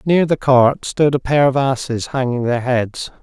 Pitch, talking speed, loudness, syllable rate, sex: 130 Hz, 205 wpm, -16 LUFS, 4.3 syllables/s, male